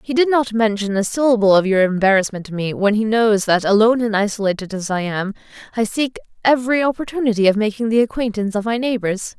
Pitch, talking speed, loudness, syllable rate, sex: 220 Hz, 205 wpm, -18 LUFS, 6.3 syllables/s, female